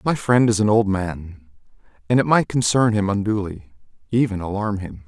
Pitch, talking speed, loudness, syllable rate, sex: 100 Hz, 165 wpm, -20 LUFS, 5.0 syllables/s, male